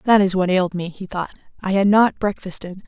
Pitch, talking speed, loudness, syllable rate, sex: 190 Hz, 230 wpm, -19 LUFS, 5.8 syllables/s, female